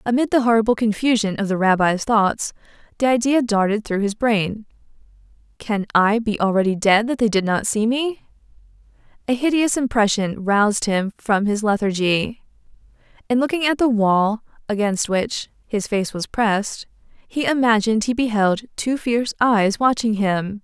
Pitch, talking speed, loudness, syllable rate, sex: 220 Hz, 155 wpm, -19 LUFS, 4.8 syllables/s, female